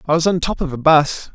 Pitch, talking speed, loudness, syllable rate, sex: 155 Hz, 310 wpm, -16 LUFS, 5.7 syllables/s, male